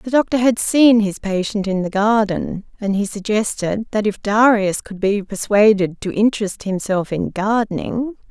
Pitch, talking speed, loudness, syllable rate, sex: 210 Hz, 165 wpm, -18 LUFS, 4.5 syllables/s, female